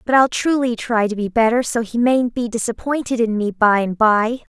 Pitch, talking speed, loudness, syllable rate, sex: 230 Hz, 225 wpm, -18 LUFS, 5.1 syllables/s, female